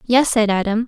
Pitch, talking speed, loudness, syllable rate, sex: 225 Hz, 205 wpm, -17 LUFS, 5.5 syllables/s, female